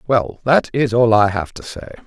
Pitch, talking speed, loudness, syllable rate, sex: 120 Hz, 235 wpm, -16 LUFS, 4.6 syllables/s, male